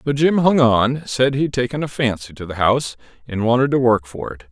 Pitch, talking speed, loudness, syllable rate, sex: 125 Hz, 225 wpm, -18 LUFS, 5.4 syllables/s, male